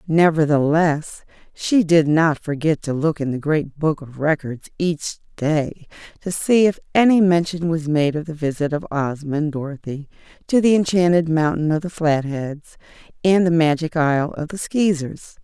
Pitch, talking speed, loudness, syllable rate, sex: 160 Hz, 165 wpm, -19 LUFS, 4.6 syllables/s, female